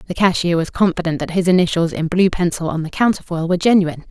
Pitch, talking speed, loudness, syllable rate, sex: 175 Hz, 220 wpm, -17 LUFS, 6.7 syllables/s, female